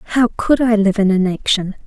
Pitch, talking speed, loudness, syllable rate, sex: 210 Hz, 195 wpm, -16 LUFS, 5.5 syllables/s, female